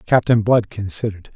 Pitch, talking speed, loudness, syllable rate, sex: 105 Hz, 135 wpm, -18 LUFS, 5.8 syllables/s, male